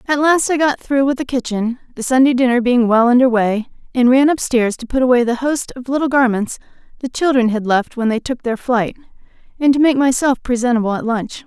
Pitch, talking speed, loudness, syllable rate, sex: 250 Hz, 220 wpm, -16 LUFS, 5.6 syllables/s, female